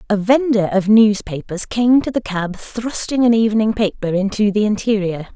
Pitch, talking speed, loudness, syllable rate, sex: 215 Hz, 170 wpm, -17 LUFS, 4.9 syllables/s, female